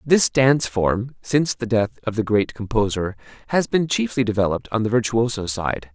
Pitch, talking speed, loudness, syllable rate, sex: 115 Hz, 180 wpm, -21 LUFS, 5.2 syllables/s, male